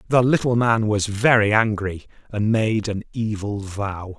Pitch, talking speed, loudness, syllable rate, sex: 110 Hz, 160 wpm, -21 LUFS, 4.1 syllables/s, male